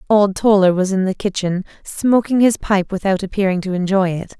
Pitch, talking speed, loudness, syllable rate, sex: 195 Hz, 190 wpm, -17 LUFS, 5.3 syllables/s, female